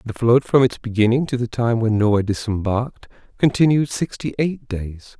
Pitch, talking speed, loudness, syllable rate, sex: 115 Hz, 175 wpm, -19 LUFS, 4.9 syllables/s, male